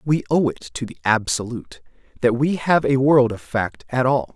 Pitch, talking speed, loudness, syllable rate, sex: 125 Hz, 205 wpm, -20 LUFS, 4.9 syllables/s, male